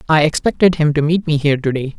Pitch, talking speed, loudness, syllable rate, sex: 150 Hz, 270 wpm, -15 LUFS, 6.6 syllables/s, male